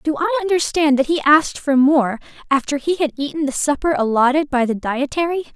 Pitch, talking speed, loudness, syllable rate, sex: 285 Hz, 195 wpm, -18 LUFS, 5.5 syllables/s, female